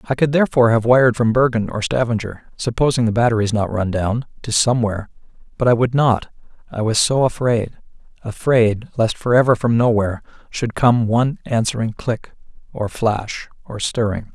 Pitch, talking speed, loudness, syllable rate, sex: 115 Hz, 165 wpm, -18 LUFS, 5.4 syllables/s, male